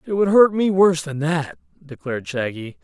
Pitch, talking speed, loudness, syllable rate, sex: 155 Hz, 190 wpm, -19 LUFS, 5.2 syllables/s, male